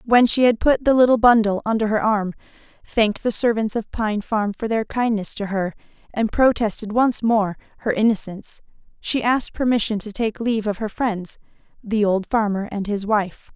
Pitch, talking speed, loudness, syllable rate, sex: 220 Hz, 185 wpm, -20 LUFS, 5.1 syllables/s, female